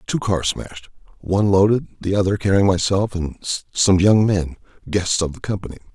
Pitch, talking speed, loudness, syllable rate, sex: 95 Hz, 170 wpm, -19 LUFS, 5.2 syllables/s, male